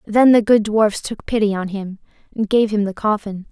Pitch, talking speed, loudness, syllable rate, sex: 210 Hz, 220 wpm, -18 LUFS, 5.0 syllables/s, female